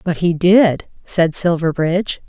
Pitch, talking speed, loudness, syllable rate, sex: 170 Hz, 130 wpm, -16 LUFS, 4.0 syllables/s, female